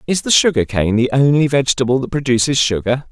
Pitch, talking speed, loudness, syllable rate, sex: 130 Hz, 195 wpm, -15 LUFS, 6.2 syllables/s, male